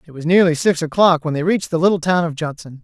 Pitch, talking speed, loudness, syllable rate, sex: 165 Hz, 275 wpm, -17 LUFS, 6.6 syllables/s, male